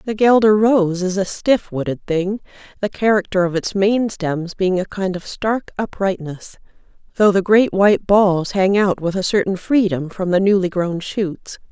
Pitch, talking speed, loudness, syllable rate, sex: 195 Hz, 185 wpm, -18 LUFS, 4.4 syllables/s, female